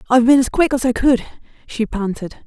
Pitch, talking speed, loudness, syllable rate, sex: 245 Hz, 245 wpm, -17 LUFS, 6.0 syllables/s, female